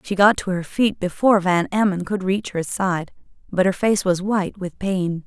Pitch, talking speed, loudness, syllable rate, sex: 190 Hz, 215 wpm, -20 LUFS, 4.8 syllables/s, female